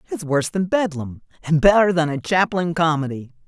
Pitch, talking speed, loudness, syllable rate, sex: 160 Hz, 175 wpm, -19 LUFS, 5.6 syllables/s, female